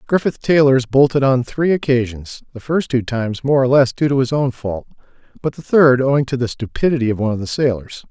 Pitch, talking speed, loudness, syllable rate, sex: 130 Hz, 220 wpm, -17 LUFS, 5.8 syllables/s, male